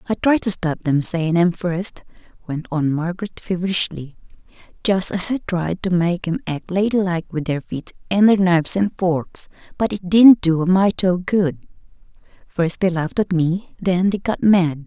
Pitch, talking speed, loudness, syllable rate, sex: 180 Hz, 185 wpm, -19 LUFS, 4.7 syllables/s, female